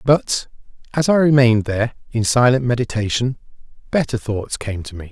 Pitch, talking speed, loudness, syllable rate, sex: 120 Hz, 150 wpm, -18 LUFS, 5.5 syllables/s, male